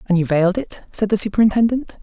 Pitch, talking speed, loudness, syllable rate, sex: 205 Hz, 210 wpm, -18 LUFS, 6.5 syllables/s, female